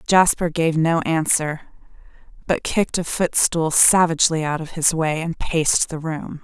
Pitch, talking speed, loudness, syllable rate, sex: 160 Hz, 160 wpm, -19 LUFS, 4.5 syllables/s, female